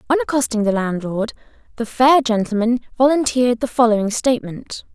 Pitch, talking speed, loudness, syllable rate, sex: 235 Hz, 135 wpm, -18 LUFS, 5.6 syllables/s, female